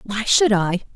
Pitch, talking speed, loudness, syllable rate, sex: 215 Hz, 190 wpm, -18 LUFS, 4.1 syllables/s, female